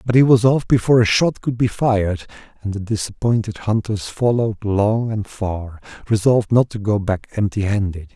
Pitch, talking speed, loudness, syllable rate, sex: 110 Hz, 185 wpm, -19 LUFS, 5.3 syllables/s, male